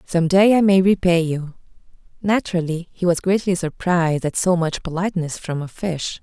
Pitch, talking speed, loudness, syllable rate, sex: 175 Hz, 175 wpm, -19 LUFS, 5.2 syllables/s, female